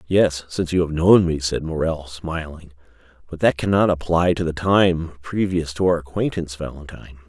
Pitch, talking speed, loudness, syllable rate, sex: 80 Hz, 175 wpm, -20 LUFS, 5.2 syllables/s, male